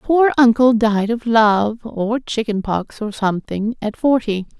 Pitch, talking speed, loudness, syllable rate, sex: 225 Hz, 155 wpm, -17 LUFS, 3.9 syllables/s, female